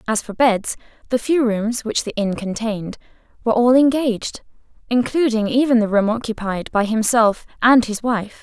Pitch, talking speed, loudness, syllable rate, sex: 230 Hz, 165 wpm, -18 LUFS, 5.0 syllables/s, female